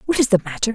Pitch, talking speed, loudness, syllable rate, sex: 215 Hz, 325 wpm, -19 LUFS, 8.9 syllables/s, female